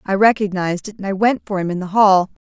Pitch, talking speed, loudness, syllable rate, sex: 195 Hz, 270 wpm, -17 LUFS, 6.5 syllables/s, female